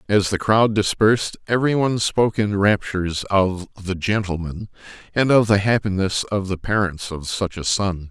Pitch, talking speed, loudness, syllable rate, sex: 100 Hz, 170 wpm, -20 LUFS, 4.9 syllables/s, male